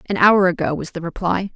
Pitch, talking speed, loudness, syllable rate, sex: 185 Hz, 230 wpm, -18 LUFS, 5.9 syllables/s, female